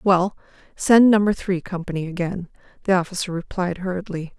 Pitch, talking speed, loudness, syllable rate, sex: 185 Hz, 135 wpm, -21 LUFS, 5.3 syllables/s, female